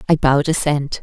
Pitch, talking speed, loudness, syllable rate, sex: 145 Hz, 175 wpm, -17 LUFS, 5.9 syllables/s, female